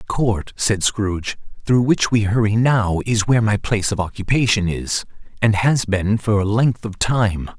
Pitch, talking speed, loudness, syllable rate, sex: 105 Hz, 190 wpm, -19 LUFS, 6.0 syllables/s, male